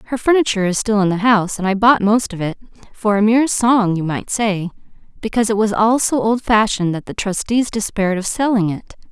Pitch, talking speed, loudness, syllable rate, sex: 210 Hz, 210 wpm, -17 LUFS, 6.0 syllables/s, female